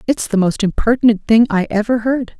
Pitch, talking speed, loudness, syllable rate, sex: 225 Hz, 200 wpm, -15 LUFS, 5.5 syllables/s, female